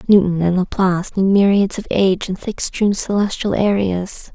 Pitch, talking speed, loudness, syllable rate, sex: 195 Hz, 165 wpm, -17 LUFS, 4.9 syllables/s, female